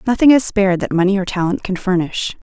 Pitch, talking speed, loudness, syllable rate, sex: 195 Hz, 215 wpm, -16 LUFS, 6.2 syllables/s, female